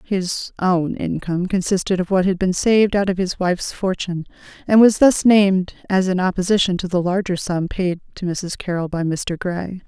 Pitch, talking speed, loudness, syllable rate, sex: 185 Hz, 195 wpm, -19 LUFS, 5.2 syllables/s, female